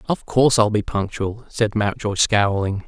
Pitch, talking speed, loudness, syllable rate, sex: 110 Hz, 165 wpm, -20 LUFS, 4.5 syllables/s, male